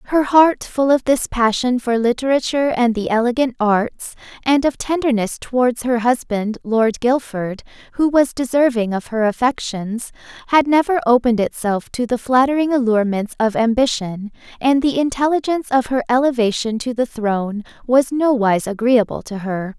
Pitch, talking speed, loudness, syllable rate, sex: 245 Hz, 150 wpm, -18 LUFS, 5.0 syllables/s, female